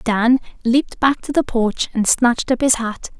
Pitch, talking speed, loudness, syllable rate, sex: 245 Hz, 205 wpm, -18 LUFS, 4.7 syllables/s, female